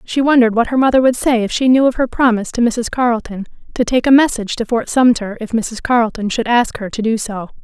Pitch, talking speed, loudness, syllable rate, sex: 235 Hz, 250 wpm, -15 LUFS, 6.3 syllables/s, female